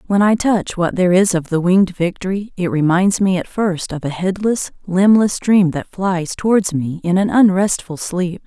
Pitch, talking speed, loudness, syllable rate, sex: 185 Hz, 200 wpm, -16 LUFS, 4.7 syllables/s, female